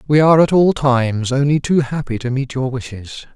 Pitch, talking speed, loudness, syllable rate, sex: 135 Hz, 215 wpm, -16 LUFS, 5.4 syllables/s, male